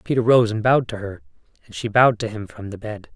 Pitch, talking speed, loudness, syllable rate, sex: 110 Hz, 265 wpm, -20 LUFS, 6.5 syllables/s, male